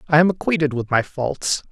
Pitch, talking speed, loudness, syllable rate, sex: 150 Hz, 210 wpm, -20 LUFS, 5.4 syllables/s, male